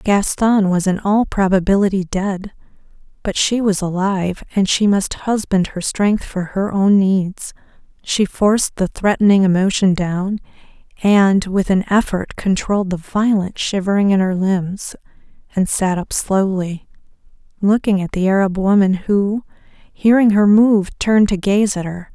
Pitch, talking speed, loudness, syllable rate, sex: 195 Hz, 150 wpm, -16 LUFS, 4.4 syllables/s, female